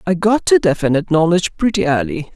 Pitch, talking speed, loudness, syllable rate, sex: 170 Hz, 180 wpm, -15 LUFS, 6.5 syllables/s, male